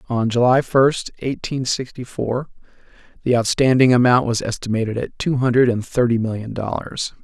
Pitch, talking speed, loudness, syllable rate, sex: 120 Hz, 150 wpm, -19 LUFS, 5.0 syllables/s, male